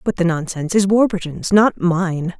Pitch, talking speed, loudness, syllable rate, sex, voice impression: 180 Hz, 175 wpm, -17 LUFS, 4.9 syllables/s, female, very feminine, adult-like, slightly middle-aged, slightly thin, slightly tensed, powerful, slightly bright, very hard, very clear, very fluent, cool, very intellectual, refreshing, very sincere, calm, slightly friendly, very reassuring, very elegant, slightly sweet, lively, strict, slightly intense, very sharp